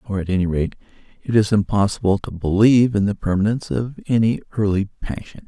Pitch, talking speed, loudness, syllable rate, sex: 105 Hz, 175 wpm, -19 LUFS, 6.2 syllables/s, male